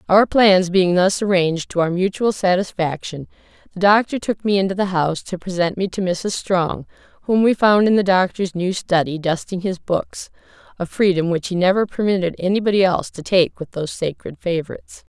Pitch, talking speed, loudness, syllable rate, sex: 185 Hz, 180 wpm, -19 LUFS, 5.4 syllables/s, female